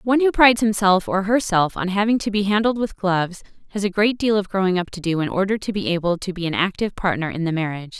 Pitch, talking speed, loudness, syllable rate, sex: 195 Hz, 265 wpm, -20 LUFS, 6.6 syllables/s, female